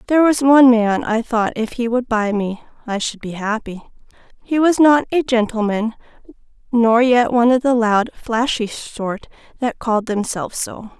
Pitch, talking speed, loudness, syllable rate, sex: 235 Hz, 175 wpm, -17 LUFS, 4.7 syllables/s, female